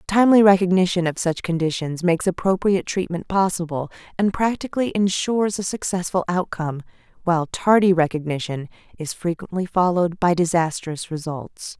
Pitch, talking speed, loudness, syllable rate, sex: 175 Hz, 120 wpm, -21 LUFS, 5.6 syllables/s, female